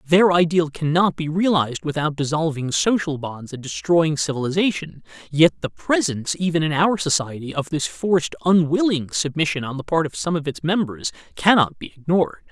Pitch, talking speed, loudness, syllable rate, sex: 160 Hz, 170 wpm, -21 LUFS, 5.3 syllables/s, male